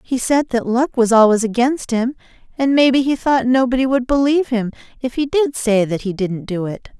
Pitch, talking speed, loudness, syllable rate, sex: 245 Hz, 215 wpm, -17 LUFS, 5.2 syllables/s, female